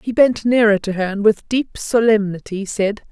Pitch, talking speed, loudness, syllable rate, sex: 215 Hz, 190 wpm, -17 LUFS, 4.8 syllables/s, female